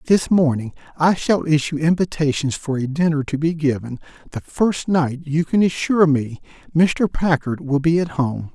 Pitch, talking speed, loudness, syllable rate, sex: 155 Hz, 175 wpm, -19 LUFS, 4.7 syllables/s, male